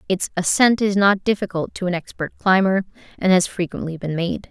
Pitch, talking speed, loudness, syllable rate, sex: 185 Hz, 185 wpm, -20 LUFS, 5.4 syllables/s, female